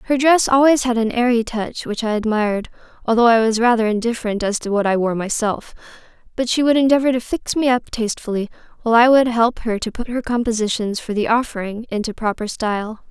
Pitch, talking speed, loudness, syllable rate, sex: 230 Hz, 205 wpm, -18 LUFS, 6.0 syllables/s, female